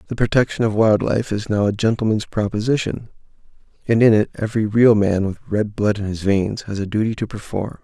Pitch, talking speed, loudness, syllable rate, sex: 105 Hz, 205 wpm, -19 LUFS, 5.6 syllables/s, male